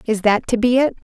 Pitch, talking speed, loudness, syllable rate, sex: 230 Hz, 270 wpm, -17 LUFS, 6.3 syllables/s, female